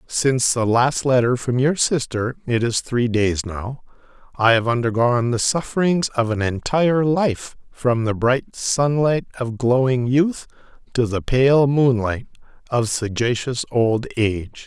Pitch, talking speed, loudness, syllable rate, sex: 125 Hz, 140 wpm, -19 LUFS, 4.1 syllables/s, male